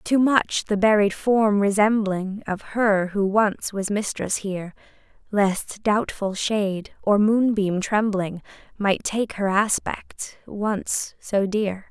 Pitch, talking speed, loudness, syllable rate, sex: 205 Hz, 130 wpm, -22 LUFS, 3.4 syllables/s, female